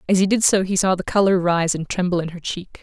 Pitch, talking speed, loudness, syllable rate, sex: 180 Hz, 295 wpm, -19 LUFS, 6.0 syllables/s, female